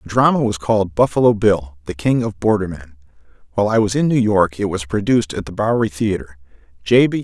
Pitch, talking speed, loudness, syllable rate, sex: 105 Hz, 215 wpm, -17 LUFS, 6.2 syllables/s, male